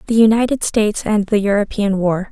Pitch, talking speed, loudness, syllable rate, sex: 210 Hz, 180 wpm, -16 LUFS, 5.6 syllables/s, female